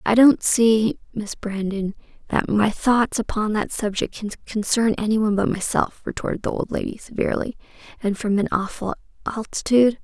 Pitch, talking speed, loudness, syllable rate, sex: 215 Hz, 155 wpm, -22 LUFS, 5.1 syllables/s, female